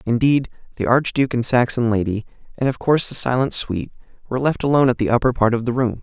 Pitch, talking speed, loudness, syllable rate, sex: 125 Hz, 220 wpm, -19 LUFS, 6.9 syllables/s, male